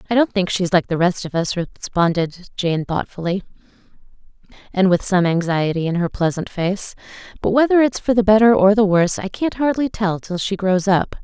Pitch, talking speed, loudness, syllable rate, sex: 190 Hz, 200 wpm, -18 LUFS, 5.3 syllables/s, female